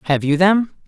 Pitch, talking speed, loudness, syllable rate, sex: 175 Hz, 205 wpm, -16 LUFS, 5.0 syllables/s, female